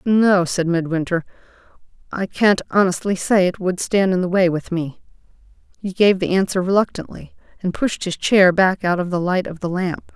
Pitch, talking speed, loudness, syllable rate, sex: 185 Hz, 190 wpm, -18 LUFS, 5.0 syllables/s, female